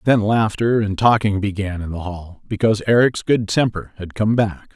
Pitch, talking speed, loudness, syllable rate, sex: 105 Hz, 190 wpm, -18 LUFS, 4.9 syllables/s, male